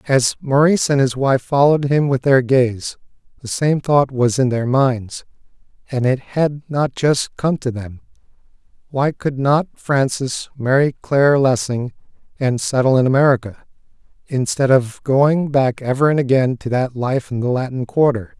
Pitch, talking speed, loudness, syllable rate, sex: 135 Hz, 165 wpm, -17 LUFS, 4.5 syllables/s, male